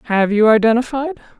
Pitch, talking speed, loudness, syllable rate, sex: 235 Hz, 130 wpm, -15 LUFS, 6.4 syllables/s, female